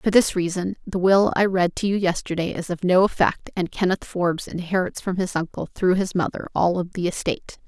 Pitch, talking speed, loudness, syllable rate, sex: 180 Hz, 220 wpm, -22 LUFS, 5.5 syllables/s, female